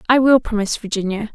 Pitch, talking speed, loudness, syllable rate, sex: 220 Hz, 180 wpm, -18 LUFS, 7.0 syllables/s, female